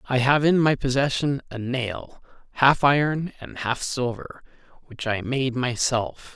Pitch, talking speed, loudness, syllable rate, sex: 130 Hz, 150 wpm, -23 LUFS, 4.0 syllables/s, male